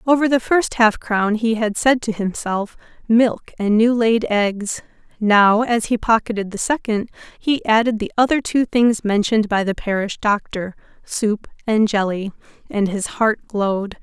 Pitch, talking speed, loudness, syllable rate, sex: 220 Hz, 165 wpm, -18 LUFS, 4.3 syllables/s, female